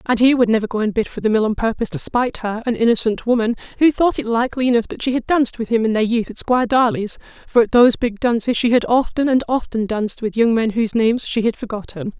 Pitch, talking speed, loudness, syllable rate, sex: 235 Hz, 265 wpm, -18 LUFS, 6.7 syllables/s, female